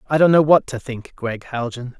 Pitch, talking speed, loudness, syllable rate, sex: 130 Hz, 240 wpm, -19 LUFS, 5.0 syllables/s, male